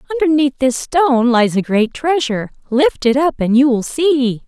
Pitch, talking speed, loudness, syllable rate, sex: 270 Hz, 190 wpm, -15 LUFS, 5.1 syllables/s, female